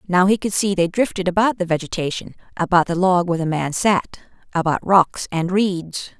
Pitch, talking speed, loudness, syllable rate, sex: 180 Hz, 195 wpm, -19 LUFS, 5.2 syllables/s, female